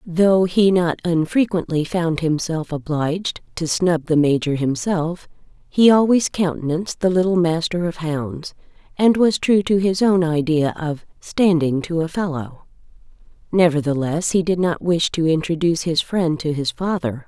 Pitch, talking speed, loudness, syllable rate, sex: 170 Hz, 155 wpm, -19 LUFS, 4.5 syllables/s, female